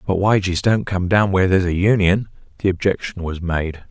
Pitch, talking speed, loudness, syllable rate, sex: 95 Hz, 200 wpm, -18 LUFS, 5.6 syllables/s, male